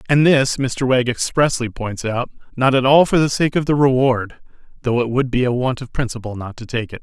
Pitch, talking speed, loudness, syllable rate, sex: 125 Hz, 230 wpm, -18 LUFS, 5.4 syllables/s, male